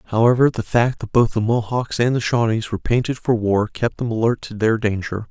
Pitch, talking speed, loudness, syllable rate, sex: 115 Hz, 225 wpm, -19 LUFS, 5.5 syllables/s, male